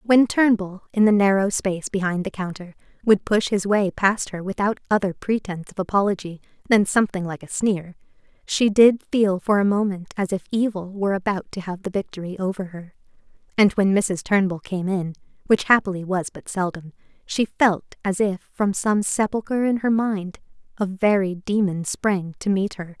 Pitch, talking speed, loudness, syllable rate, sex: 195 Hz, 185 wpm, -22 LUFS, 5.0 syllables/s, female